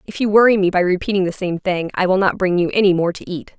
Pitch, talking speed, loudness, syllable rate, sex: 185 Hz, 300 wpm, -17 LUFS, 6.5 syllables/s, female